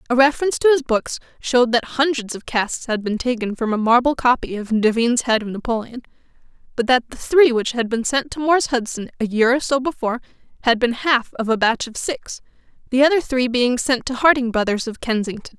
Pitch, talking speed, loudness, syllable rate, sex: 245 Hz, 215 wpm, -19 LUFS, 5.8 syllables/s, female